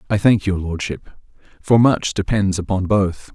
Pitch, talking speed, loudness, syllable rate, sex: 95 Hz, 160 wpm, -18 LUFS, 4.4 syllables/s, male